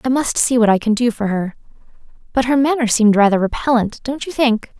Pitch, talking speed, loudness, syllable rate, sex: 235 Hz, 225 wpm, -16 LUFS, 5.9 syllables/s, female